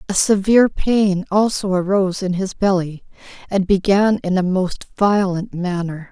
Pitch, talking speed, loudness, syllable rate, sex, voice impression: 190 Hz, 145 wpm, -18 LUFS, 4.6 syllables/s, female, feminine, adult-like, calm, slightly kind